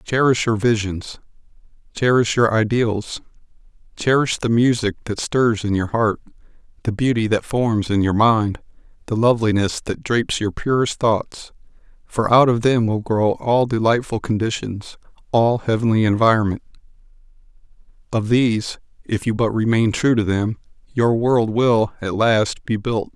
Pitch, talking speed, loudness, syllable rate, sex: 115 Hz, 145 wpm, -19 LUFS, 4.6 syllables/s, male